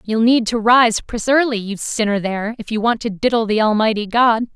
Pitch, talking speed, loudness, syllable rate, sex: 225 Hz, 225 wpm, -17 LUFS, 5.5 syllables/s, female